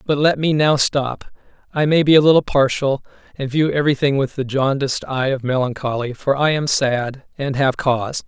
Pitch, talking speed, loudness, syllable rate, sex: 135 Hz, 180 wpm, -18 LUFS, 5.2 syllables/s, male